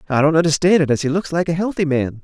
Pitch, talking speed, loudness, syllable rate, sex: 160 Hz, 295 wpm, -17 LUFS, 6.9 syllables/s, male